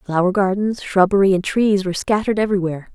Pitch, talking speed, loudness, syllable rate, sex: 195 Hz, 165 wpm, -18 LUFS, 6.6 syllables/s, female